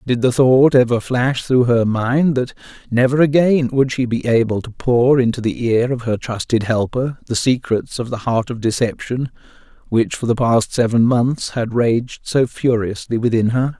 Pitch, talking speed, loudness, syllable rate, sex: 120 Hz, 185 wpm, -17 LUFS, 4.5 syllables/s, male